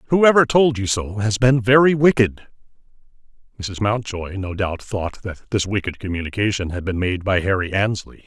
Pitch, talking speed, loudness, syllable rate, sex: 105 Hz, 165 wpm, -19 LUFS, 5.0 syllables/s, male